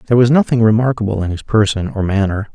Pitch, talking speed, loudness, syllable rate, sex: 110 Hz, 210 wpm, -15 LUFS, 6.9 syllables/s, male